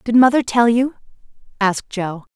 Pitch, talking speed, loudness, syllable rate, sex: 225 Hz, 155 wpm, -17 LUFS, 5.2 syllables/s, female